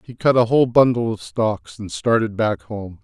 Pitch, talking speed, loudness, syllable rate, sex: 115 Hz, 215 wpm, -19 LUFS, 4.8 syllables/s, male